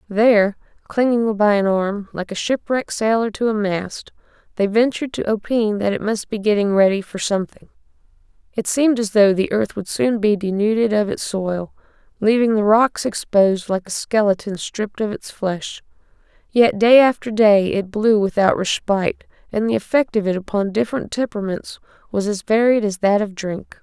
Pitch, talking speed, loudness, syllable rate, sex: 210 Hz, 180 wpm, -19 LUFS, 5.2 syllables/s, female